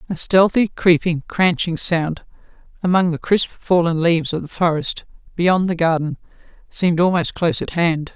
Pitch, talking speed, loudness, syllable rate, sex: 170 Hz, 155 wpm, -18 LUFS, 5.0 syllables/s, female